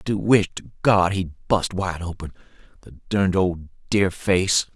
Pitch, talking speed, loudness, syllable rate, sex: 95 Hz, 175 wpm, -22 LUFS, 4.4 syllables/s, male